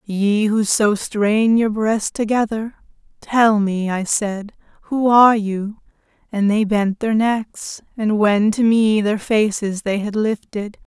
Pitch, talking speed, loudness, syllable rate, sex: 215 Hz, 155 wpm, -18 LUFS, 3.5 syllables/s, female